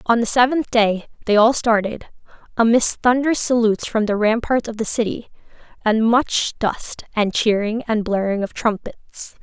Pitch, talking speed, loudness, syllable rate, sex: 225 Hz, 160 wpm, -19 LUFS, 4.6 syllables/s, female